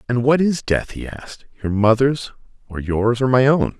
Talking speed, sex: 205 wpm, male